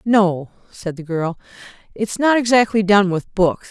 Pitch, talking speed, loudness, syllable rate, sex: 200 Hz, 160 wpm, -18 LUFS, 4.2 syllables/s, female